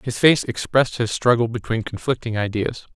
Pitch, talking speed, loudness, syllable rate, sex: 115 Hz, 165 wpm, -21 LUFS, 5.4 syllables/s, male